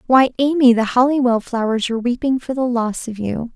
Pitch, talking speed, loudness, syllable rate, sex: 245 Hz, 205 wpm, -17 LUFS, 5.5 syllables/s, female